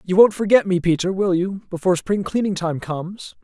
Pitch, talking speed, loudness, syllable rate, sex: 185 Hz, 210 wpm, -20 LUFS, 5.6 syllables/s, male